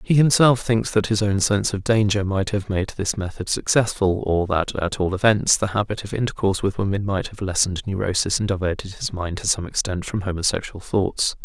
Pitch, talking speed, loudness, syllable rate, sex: 100 Hz, 210 wpm, -21 LUFS, 5.5 syllables/s, male